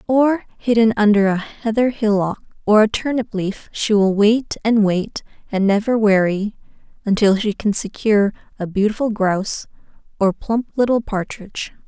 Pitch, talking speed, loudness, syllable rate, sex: 215 Hz, 145 wpm, -18 LUFS, 4.7 syllables/s, female